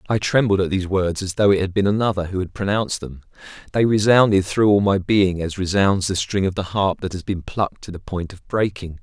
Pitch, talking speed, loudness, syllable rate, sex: 95 Hz, 245 wpm, -20 LUFS, 5.8 syllables/s, male